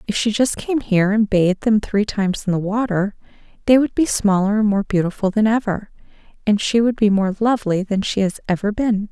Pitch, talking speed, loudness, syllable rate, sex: 210 Hz, 215 wpm, -18 LUFS, 5.7 syllables/s, female